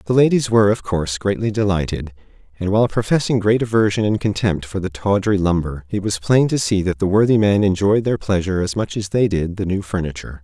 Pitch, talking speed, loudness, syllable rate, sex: 100 Hz, 220 wpm, -18 LUFS, 6.0 syllables/s, male